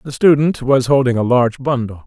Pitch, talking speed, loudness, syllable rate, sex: 130 Hz, 205 wpm, -15 LUFS, 5.6 syllables/s, male